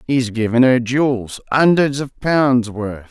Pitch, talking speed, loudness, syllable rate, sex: 125 Hz, 155 wpm, -16 LUFS, 3.6 syllables/s, male